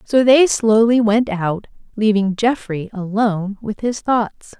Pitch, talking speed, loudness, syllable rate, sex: 215 Hz, 145 wpm, -17 LUFS, 3.9 syllables/s, female